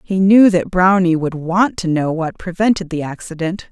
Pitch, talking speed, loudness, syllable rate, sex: 180 Hz, 195 wpm, -16 LUFS, 4.7 syllables/s, female